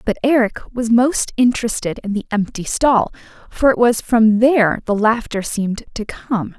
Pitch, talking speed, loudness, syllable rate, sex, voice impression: 230 Hz, 175 wpm, -17 LUFS, 4.7 syllables/s, female, feminine, slightly adult-like, slightly fluent, slightly intellectual, slightly lively